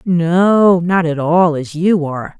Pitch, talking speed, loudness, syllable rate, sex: 170 Hz, 175 wpm, -14 LUFS, 3.5 syllables/s, female